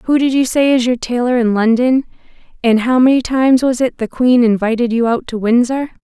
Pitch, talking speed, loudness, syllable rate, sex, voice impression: 245 Hz, 220 wpm, -14 LUFS, 5.5 syllables/s, female, feminine, slightly adult-like, slightly clear, refreshing, friendly